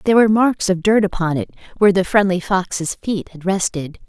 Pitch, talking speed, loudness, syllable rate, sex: 190 Hz, 205 wpm, -17 LUFS, 5.5 syllables/s, female